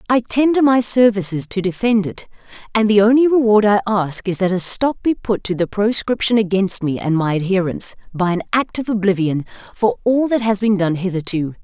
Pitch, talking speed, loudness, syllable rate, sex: 205 Hz, 200 wpm, -17 LUFS, 5.3 syllables/s, female